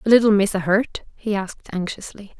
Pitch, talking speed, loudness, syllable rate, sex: 200 Hz, 150 wpm, -21 LUFS, 5.1 syllables/s, female